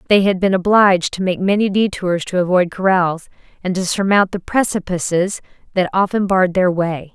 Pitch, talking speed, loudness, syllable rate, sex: 185 Hz, 175 wpm, -16 LUFS, 5.1 syllables/s, female